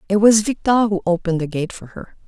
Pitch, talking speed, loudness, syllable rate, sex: 195 Hz, 240 wpm, -18 LUFS, 6.1 syllables/s, female